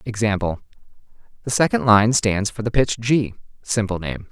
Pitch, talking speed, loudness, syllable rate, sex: 110 Hz, 155 wpm, -20 LUFS, 5.0 syllables/s, male